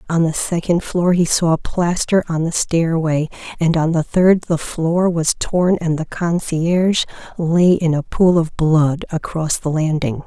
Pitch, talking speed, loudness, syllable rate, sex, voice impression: 165 Hz, 175 wpm, -17 LUFS, 4.0 syllables/s, female, very feminine, middle-aged, thin, tensed, slightly powerful, bright, soft, clear, fluent, slightly raspy, slightly cute, cool, intellectual, slightly refreshing, sincere, calm, very friendly, reassuring, very unique, slightly elegant, slightly wild, slightly sweet, lively, kind, slightly intense, slightly sharp